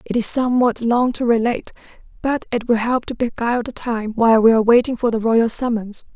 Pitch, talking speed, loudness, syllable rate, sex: 235 Hz, 215 wpm, -18 LUFS, 6.0 syllables/s, female